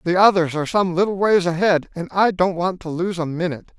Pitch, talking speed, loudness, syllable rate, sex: 175 Hz, 240 wpm, -19 LUFS, 5.9 syllables/s, male